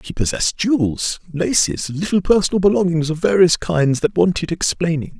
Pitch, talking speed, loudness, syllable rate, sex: 165 Hz, 150 wpm, -17 LUFS, 5.2 syllables/s, male